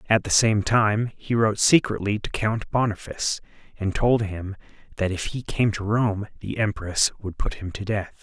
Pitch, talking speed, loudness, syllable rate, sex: 105 Hz, 190 wpm, -23 LUFS, 4.8 syllables/s, male